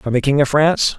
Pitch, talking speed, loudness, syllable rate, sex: 140 Hz, 305 wpm, -15 LUFS, 6.3 syllables/s, male